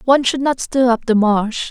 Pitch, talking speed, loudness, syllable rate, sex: 245 Hz, 245 wpm, -16 LUFS, 5.0 syllables/s, female